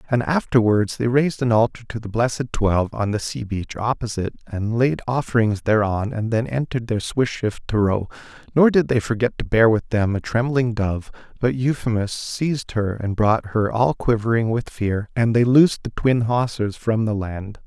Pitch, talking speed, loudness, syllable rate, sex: 115 Hz, 195 wpm, -21 LUFS, 5.1 syllables/s, male